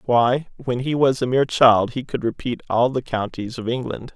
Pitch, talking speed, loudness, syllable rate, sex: 125 Hz, 215 wpm, -21 LUFS, 5.0 syllables/s, male